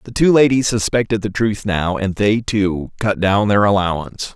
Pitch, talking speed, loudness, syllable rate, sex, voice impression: 105 Hz, 195 wpm, -17 LUFS, 4.8 syllables/s, male, very masculine, middle-aged, very thick, tensed, very powerful, slightly bright, slightly soft, slightly clear, fluent, slightly raspy, very cool, very intellectual, refreshing, sincere, very calm, mature, very friendly, very reassuring, very unique, elegant, wild, sweet, lively, kind, slightly intense